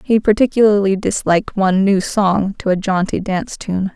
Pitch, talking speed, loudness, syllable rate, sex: 195 Hz, 165 wpm, -16 LUFS, 5.2 syllables/s, female